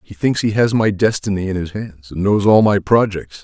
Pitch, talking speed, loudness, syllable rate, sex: 100 Hz, 245 wpm, -16 LUFS, 5.1 syllables/s, male